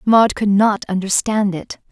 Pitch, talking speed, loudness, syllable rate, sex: 200 Hz, 155 wpm, -16 LUFS, 4.1 syllables/s, female